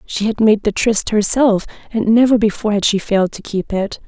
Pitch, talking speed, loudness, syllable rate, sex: 210 Hz, 220 wpm, -16 LUFS, 5.5 syllables/s, female